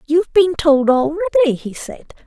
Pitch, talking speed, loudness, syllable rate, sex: 320 Hz, 185 wpm, -15 LUFS, 5.5 syllables/s, female